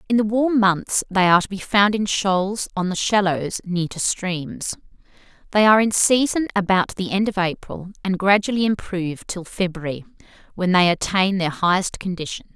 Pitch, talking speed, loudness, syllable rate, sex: 190 Hz, 175 wpm, -20 LUFS, 4.9 syllables/s, female